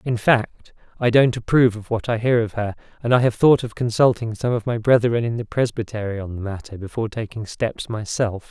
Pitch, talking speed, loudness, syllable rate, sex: 115 Hz, 220 wpm, -21 LUFS, 5.6 syllables/s, male